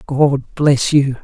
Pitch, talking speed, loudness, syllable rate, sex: 140 Hz, 145 wpm, -15 LUFS, 3.2 syllables/s, male